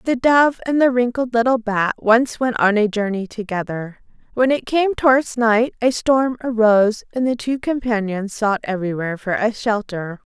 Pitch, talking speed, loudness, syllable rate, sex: 230 Hz, 175 wpm, -18 LUFS, 4.8 syllables/s, female